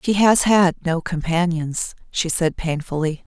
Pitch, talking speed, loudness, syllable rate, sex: 170 Hz, 145 wpm, -20 LUFS, 4.1 syllables/s, female